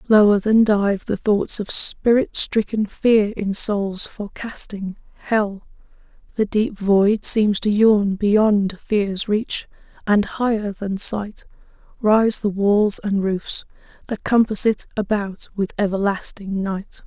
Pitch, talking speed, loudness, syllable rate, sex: 205 Hz, 135 wpm, -19 LUFS, 3.5 syllables/s, female